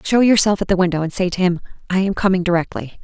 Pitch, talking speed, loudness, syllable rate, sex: 185 Hz, 255 wpm, -18 LUFS, 6.8 syllables/s, female